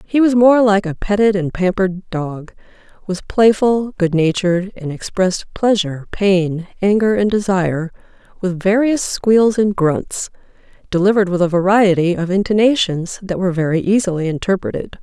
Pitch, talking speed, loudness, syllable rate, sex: 190 Hz, 140 wpm, -16 LUFS, 5.0 syllables/s, female